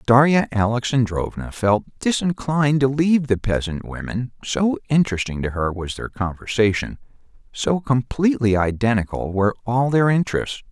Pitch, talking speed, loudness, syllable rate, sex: 120 Hz, 130 wpm, -20 LUFS, 5.2 syllables/s, male